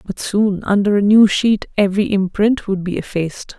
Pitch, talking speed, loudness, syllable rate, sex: 200 Hz, 185 wpm, -16 LUFS, 5.1 syllables/s, female